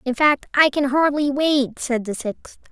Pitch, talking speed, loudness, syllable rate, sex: 275 Hz, 200 wpm, -19 LUFS, 4.4 syllables/s, female